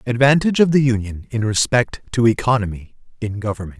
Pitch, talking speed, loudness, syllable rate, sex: 115 Hz, 160 wpm, -18 LUFS, 6.0 syllables/s, male